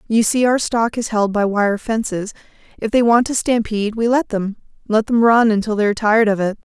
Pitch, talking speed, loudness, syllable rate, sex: 220 Hz, 225 wpm, -17 LUFS, 5.6 syllables/s, female